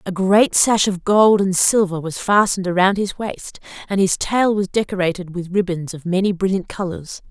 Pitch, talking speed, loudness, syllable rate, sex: 190 Hz, 190 wpm, -18 LUFS, 5.0 syllables/s, female